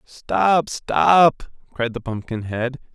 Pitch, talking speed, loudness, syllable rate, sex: 125 Hz, 100 wpm, -20 LUFS, 2.9 syllables/s, male